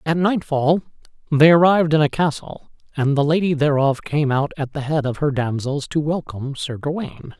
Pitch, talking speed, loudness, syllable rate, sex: 150 Hz, 185 wpm, -19 LUFS, 5.1 syllables/s, male